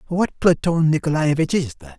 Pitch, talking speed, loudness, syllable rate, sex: 155 Hz, 150 wpm, -19 LUFS, 5.1 syllables/s, male